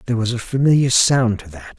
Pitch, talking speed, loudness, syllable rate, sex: 115 Hz, 235 wpm, -16 LUFS, 6.1 syllables/s, male